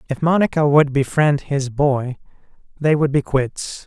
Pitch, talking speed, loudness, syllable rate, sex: 140 Hz, 155 wpm, -18 LUFS, 4.2 syllables/s, male